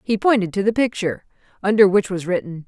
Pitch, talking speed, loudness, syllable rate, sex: 195 Hz, 200 wpm, -19 LUFS, 6.3 syllables/s, female